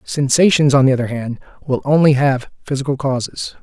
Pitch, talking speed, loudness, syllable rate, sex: 135 Hz, 165 wpm, -16 LUFS, 5.5 syllables/s, male